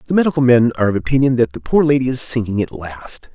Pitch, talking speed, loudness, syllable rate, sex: 120 Hz, 250 wpm, -16 LUFS, 6.8 syllables/s, male